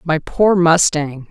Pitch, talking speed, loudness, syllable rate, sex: 165 Hz, 140 wpm, -14 LUFS, 3.3 syllables/s, female